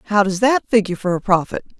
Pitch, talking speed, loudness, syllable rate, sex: 200 Hz, 235 wpm, -17 LUFS, 6.8 syllables/s, female